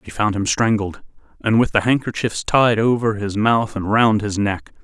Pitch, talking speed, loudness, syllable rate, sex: 110 Hz, 200 wpm, -18 LUFS, 4.6 syllables/s, male